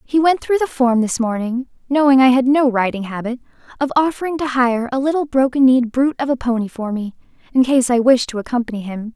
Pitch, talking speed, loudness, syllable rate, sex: 255 Hz, 225 wpm, -17 LUFS, 5.2 syllables/s, female